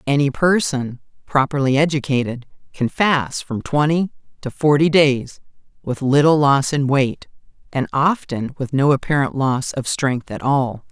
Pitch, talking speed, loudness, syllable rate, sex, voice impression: 140 Hz, 145 wpm, -18 LUFS, 4.3 syllables/s, female, feminine, very adult-like, slightly clear, intellectual, elegant